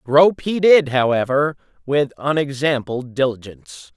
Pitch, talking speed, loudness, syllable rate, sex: 140 Hz, 105 wpm, -18 LUFS, 4.6 syllables/s, male